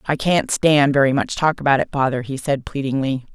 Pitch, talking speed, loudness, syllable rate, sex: 140 Hz, 215 wpm, -19 LUFS, 5.4 syllables/s, female